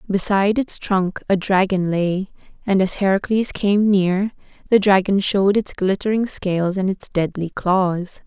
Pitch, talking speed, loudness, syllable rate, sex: 195 Hz, 150 wpm, -19 LUFS, 4.4 syllables/s, female